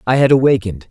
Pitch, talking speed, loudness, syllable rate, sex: 120 Hz, 200 wpm, -13 LUFS, 7.8 syllables/s, male